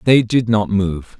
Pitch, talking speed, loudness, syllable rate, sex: 105 Hz, 200 wpm, -16 LUFS, 3.7 syllables/s, male